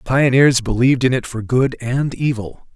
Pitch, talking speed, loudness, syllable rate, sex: 125 Hz, 195 wpm, -17 LUFS, 5.1 syllables/s, male